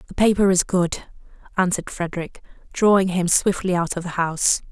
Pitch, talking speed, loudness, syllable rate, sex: 180 Hz, 165 wpm, -20 LUFS, 5.7 syllables/s, female